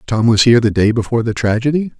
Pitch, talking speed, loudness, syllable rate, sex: 115 Hz, 240 wpm, -14 LUFS, 7.1 syllables/s, male